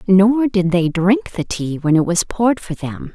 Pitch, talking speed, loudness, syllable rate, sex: 185 Hz, 230 wpm, -17 LUFS, 4.4 syllables/s, female